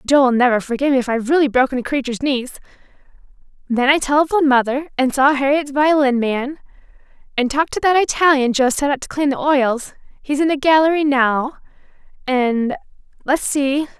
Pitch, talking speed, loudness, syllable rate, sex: 275 Hz, 160 wpm, -17 LUFS, 5.8 syllables/s, female